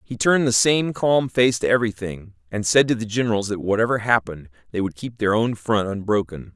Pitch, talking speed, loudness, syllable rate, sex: 110 Hz, 210 wpm, -21 LUFS, 5.8 syllables/s, male